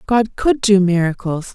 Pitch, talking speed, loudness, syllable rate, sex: 200 Hz, 155 wpm, -16 LUFS, 4.3 syllables/s, female